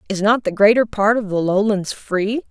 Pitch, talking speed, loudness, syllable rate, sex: 205 Hz, 215 wpm, -17 LUFS, 4.8 syllables/s, female